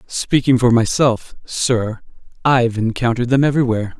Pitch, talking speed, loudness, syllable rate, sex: 120 Hz, 120 wpm, -17 LUFS, 5.4 syllables/s, male